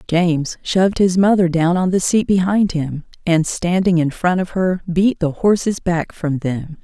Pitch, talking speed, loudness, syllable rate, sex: 175 Hz, 195 wpm, -17 LUFS, 4.4 syllables/s, female